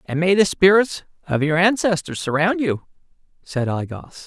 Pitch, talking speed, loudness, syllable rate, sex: 170 Hz, 170 wpm, -19 LUFS, 4.7 syllables/s, male